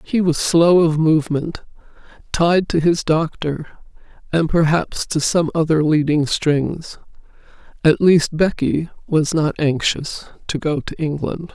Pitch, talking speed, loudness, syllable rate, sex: 160 Hz, 135 wpm, -18 LUFS, 3.9 syllables/s, female